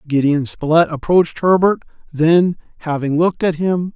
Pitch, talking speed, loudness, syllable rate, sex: 165 Hz, 135 wpm, -16 LUFS, 5.0 syllables/s, male